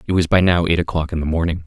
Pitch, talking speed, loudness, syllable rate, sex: 85 Hz, 325 wpm, -18 LUFS, 7.3 syllables/s, male